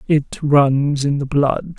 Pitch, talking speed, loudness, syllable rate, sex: 145 Hz, 170 wpm, -17 LUFS, 3.1 syllables/s, female